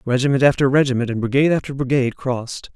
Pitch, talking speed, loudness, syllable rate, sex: 130 Hz, 175 wpm, -18 LUFS, 7.2 syllables/s, male